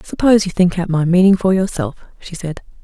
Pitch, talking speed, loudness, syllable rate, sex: 185 Hz, 210 wpm, -15 LUFS, 5.8 syllables/s, female